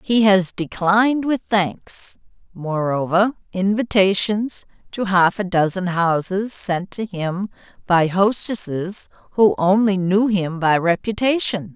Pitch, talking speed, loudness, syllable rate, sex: 195 Hz, 115 wpm, -19 LUFS, 3.7 syllables/s, female